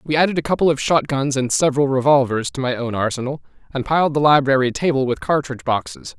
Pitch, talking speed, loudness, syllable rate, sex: 135 Hz, 215 wpm, -18 LUFS, 6.4 syllables/s, male